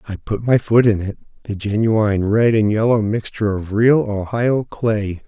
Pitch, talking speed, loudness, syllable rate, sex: 110 Hz, 170 wpm, -17 LUFS, 4.6 syllables/s, male